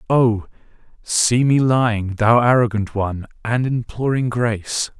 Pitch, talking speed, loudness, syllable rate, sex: 115 Hz, 120 wpm, -18 LUFS, 4.2 syllables/s, male